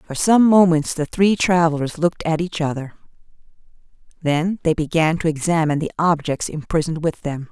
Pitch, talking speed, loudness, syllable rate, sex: 160 Hz, 160 wpm, -19 LUFS, 5.5 syllables/s, female